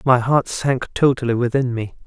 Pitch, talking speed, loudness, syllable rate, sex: 125 Hz, 175 wpm, -19 LUFS, 4.8 syllables/s, male